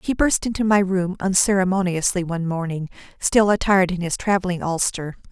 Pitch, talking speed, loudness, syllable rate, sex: 185 Hz, 160 wpm, -20 LUFS, 5.7 syllables/s, female